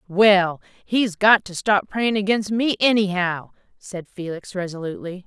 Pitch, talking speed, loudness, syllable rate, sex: 195 Hz, 135 wpm, -20 LUFS, 4.3 syllables/s, female